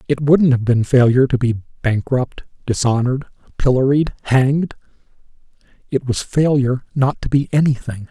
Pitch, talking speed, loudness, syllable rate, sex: 130 Hz, 135 wpm, -17 LUFS, 5.2 syllables/s, male